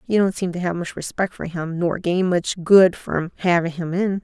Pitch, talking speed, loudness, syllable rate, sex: 175 Hz, 240 wpm, -20 LUFS, 5.0 syllables/s, female